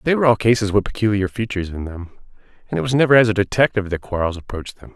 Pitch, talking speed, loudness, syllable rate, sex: 105 Hz, 240 wpm, -19 LUFS, 7.8 syllables/s, male